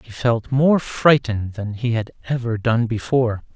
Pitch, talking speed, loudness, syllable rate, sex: 120 Hz, 170 wpm, -20 LUFS, 4.6 syllables/s, male